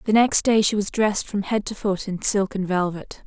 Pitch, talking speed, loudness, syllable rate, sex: 205 Hz, 255 wpm, -21 LUFS, 5.1 syllables/s, female